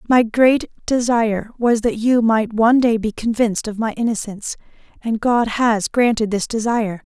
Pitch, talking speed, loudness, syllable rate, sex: 225 Hz, 170 wpm, -18 LUFS, 5.0 syllables/s, female